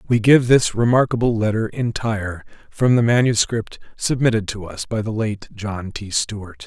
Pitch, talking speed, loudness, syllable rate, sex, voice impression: 110 Hz, 160 wpm, -19 LUFS, 4.7 syllables/s, male, very masculine, adult-like, thick, tensed, slightly powerful, slightly bright, soft, clear, fluent, slightly raspy, cool, very intellectual, refreshing, sincere, calm, slightly mature, very friendly, reassuring, unique, very elegant, wild, very sweet, lively, kind, slightly intense